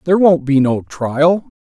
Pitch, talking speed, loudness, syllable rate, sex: 155 Hz, 185 wpm, -14 LUFS, 4.4 syllables/s, male